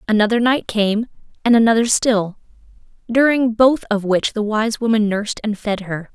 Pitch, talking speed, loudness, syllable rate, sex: 220 Hz, 165 wpm, -17 LUFS, 4.9 syllables/s, female